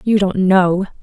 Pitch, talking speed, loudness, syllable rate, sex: 190 Hz, 175 wpm, -15 LUFS, 3.9 syllables/s, female